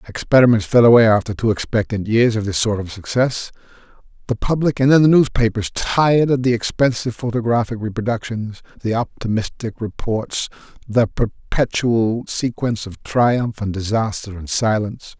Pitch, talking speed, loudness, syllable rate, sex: 115 Hz, 140 wpm, -18 LUFS, 5.1 syllables/s, male